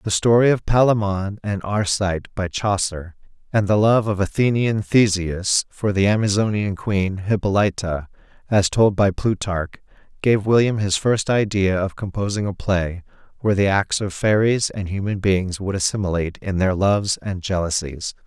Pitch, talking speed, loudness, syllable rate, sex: 100 Hz, 155 wpm, -20 LUFS, 4.7 syllables/s, male